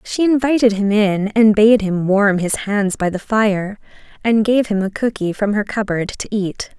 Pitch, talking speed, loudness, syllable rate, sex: 210 Hz, 205 wpm, -16 LUFS, 4.4 syllables/s, female